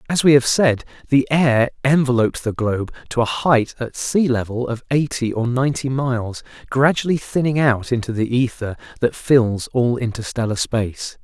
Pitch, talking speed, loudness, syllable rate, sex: 125 Hz, 160 wpm, -19 LUFS, 5.0 syllables/s, male